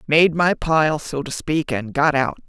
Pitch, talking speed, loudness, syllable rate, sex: 150 Hz, 220 wpm, -19 LUFS, 4.0 syllables/s, female